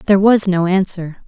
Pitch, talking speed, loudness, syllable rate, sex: 190 Hz, 190 wpm, -14 LUFS, 4.9 syllables/s, female